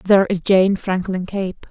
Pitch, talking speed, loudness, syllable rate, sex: 190 Hz, 175 wpm, -18 LUFS, 4.4 syllables/s, female